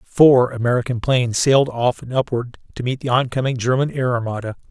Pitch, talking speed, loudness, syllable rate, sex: 125 Hz, 180 wpm, -19 LUFS, 5.8 syllables/s, male